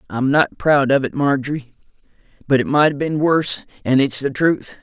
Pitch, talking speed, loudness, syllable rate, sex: 135 Hz, 200 wpm, -18 LUFS, 5.2 syllables/s, male